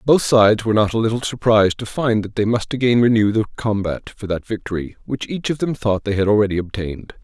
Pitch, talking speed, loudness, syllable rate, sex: 110 Hz, 230 wpm, -19 LUFS, 6.2 syllables/s, male